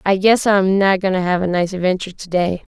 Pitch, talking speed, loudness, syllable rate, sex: 190 Hz, 260 wpm, -17 LUFS, 6.2 syllables/s, female